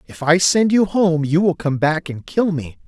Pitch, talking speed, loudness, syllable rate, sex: 165 Hz, 250 wpm, -17 LUFS, 4.5 syllables/s, male